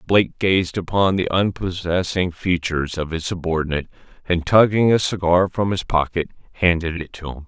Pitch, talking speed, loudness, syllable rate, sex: 90 Hz, 160 wpm, -20 LUFS, 5.5 syllables/s, male